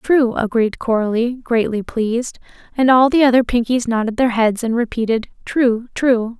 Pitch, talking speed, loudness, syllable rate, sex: 235 Hz, 150 wpm, -17 LUFS, 4.7 syllables/s, female